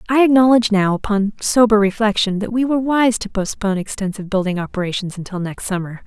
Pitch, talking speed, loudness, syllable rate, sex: 210 Hz, 180 wpm, -17 LUFS, 6.4 syllables/s, female